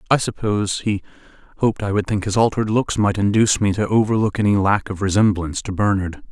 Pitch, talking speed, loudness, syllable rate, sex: 100 Hz, 200 wpm, -19 LUFS, 6.5 syllables/s, male